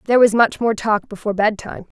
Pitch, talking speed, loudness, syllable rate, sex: 215 Hz, 210 wpm, -17 LUFS, 6.9 syllables/s, female